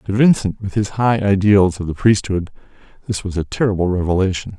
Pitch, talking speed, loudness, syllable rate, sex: 100 Hz, 185 wpm, -17 LUFS, 5.3 syllables/s, male